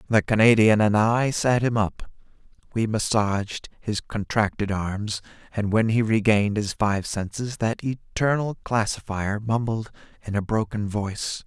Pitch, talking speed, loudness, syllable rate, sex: 110 Hz, 140 wpm, -24 LUFS, 4.4 syllables/s, male